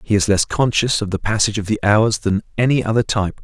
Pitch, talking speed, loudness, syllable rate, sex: 105 Hz, 245 wpm, -17 LUFS, 6.4 syllables/s, male